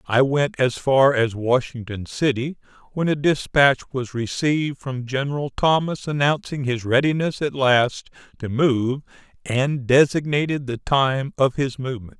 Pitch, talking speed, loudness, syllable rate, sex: 135 Hz, 145 wpm, -21 LUFS, 4.4 syllables/s, male